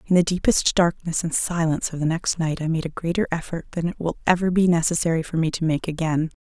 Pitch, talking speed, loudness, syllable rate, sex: 165 Hz, 240 wpm, -22 LUFS, 6.2 syllables/s, female